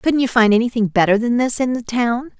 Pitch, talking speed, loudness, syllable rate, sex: 235 Hz, 250 wpm, -17 LUFS, 5.7 syllables/s, female